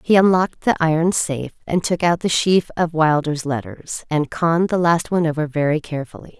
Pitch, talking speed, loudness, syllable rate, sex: 160 Hz, 195 wpm, -19 LUFS, 5.7 syllables/s, female